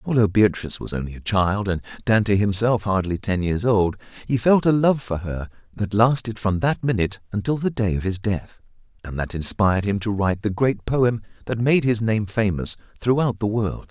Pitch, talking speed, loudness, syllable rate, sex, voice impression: 105 Hz, 205 wpm, -22 LUFS, 5.2 syllables/s, male, very masculine, very adult-like, middle-aged, very thick, slightly tensed, slightly weak, bright, very soft, slightly muffled, very fluent, slightly raspy, cool, very intellectual, refreshing, very sincere, very calm, very mature, very friendly, very reassuring, very unique, elegant, slightly wild, very sweet, lively, very kind, modest